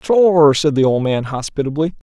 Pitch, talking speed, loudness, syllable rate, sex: 150 Hz, 170 wpm, -15 LUFS, 5.3 syllables/s, male